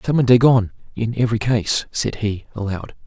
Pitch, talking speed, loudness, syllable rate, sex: 115 Hz, 155 wpm, -19 LUFS, 5.1 syllables/s, male